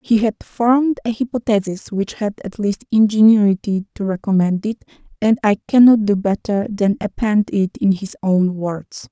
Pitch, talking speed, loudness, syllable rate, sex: 210 Hz, 165 wpm, -17 LUFS, 4.7 syllables/s, female